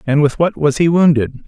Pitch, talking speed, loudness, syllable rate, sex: 150 Hz, 245 wpm, -14 LUFS, 5.3 syllables/s, male